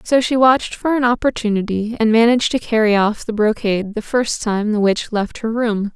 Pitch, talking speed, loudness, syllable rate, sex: 225 Hz, 210 wpm, -17 LUFS, 5.4 syllables/s, female